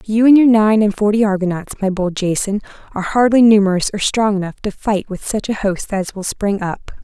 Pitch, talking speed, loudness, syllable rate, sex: 205 Hz, 220 wpm, -16 LUFS, 5.3 syllables/s, female